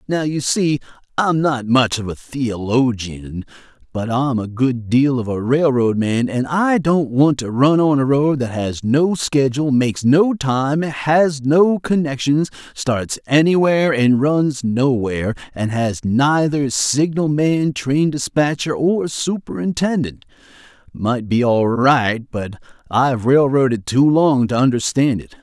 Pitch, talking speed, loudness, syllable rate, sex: 135 Hz, 150 wpm, -17 LUFS, 3.9 syllables/s, male